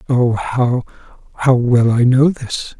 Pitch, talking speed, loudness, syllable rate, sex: 125 Hz, 130 wpm, -15 LUFS, 3.1 syllables/s, male